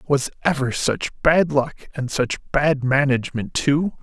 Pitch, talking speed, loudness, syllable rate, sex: 135 Hz, 150 wpm, -21 LUFS, 4.0 syllables/s, male